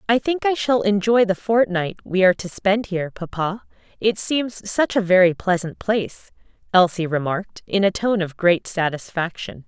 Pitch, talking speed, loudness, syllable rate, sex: 195 Hz, 175 wpm, -20 LUFS, 4.9 syllables/s, female